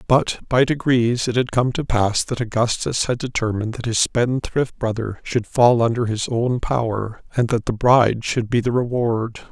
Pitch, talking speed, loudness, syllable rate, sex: 120 Hz, 190 wpm, -20 LUFS, 4.7 syllables/s, male